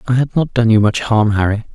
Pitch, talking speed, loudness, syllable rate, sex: 115 Hz, 275 wpm, -15 LUFS, 5.8 syllables/s, male